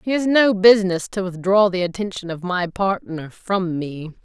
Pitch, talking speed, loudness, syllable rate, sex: 190 Hz, 185 wpm, -19 LUFS, 4.6 syllables/s, female